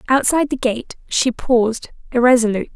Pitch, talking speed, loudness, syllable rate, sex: 245 Hz, 130 wpm, -17 LUFS, 5.8 syllables/s, female